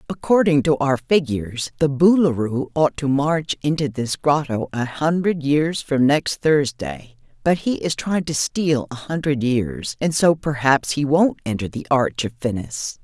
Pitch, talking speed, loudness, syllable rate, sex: 145 Hz, 170 wpm, -20 LUFS, 4.2 syllables/s, female